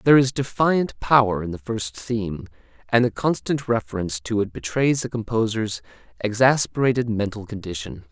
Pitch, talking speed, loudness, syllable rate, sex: 110 Hz, 150 wpm, -22 LUFS, 5.3 syllables/s, male